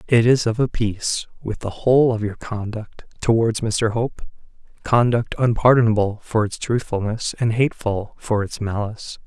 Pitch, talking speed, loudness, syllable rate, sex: 110 Hz, 150 wpm, -20 LUFS, 5.0 syllables/s, male